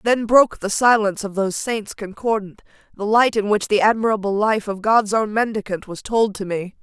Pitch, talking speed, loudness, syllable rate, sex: 210 Hz, 200 wpm, -19 LUFS, 5.4 syllables/s, female